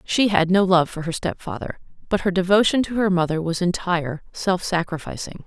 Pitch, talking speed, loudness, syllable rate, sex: 180 Hz, 185 wpm, -21 LUFS, 5.4 syllables/s, female